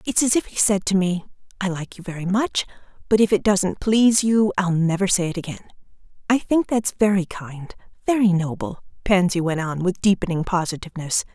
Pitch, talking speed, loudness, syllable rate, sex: 190 Hz, 190 wpm, -21 LUFS, 5.5 syllables/s, female